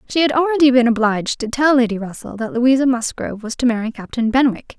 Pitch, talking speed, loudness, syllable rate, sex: 245 Hz, 215 wpm, -17 LUFS, 6.3 syllables/s, female